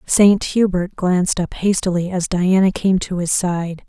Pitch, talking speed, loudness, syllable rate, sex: 185 Hz, 170 wpm, -17 LUFS, 4.3 syllables/s, female